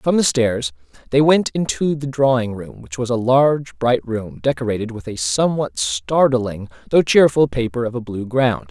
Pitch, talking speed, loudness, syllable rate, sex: 120 Hz, 185 wpm, -18 LUFS, 4.7 syllables/s, male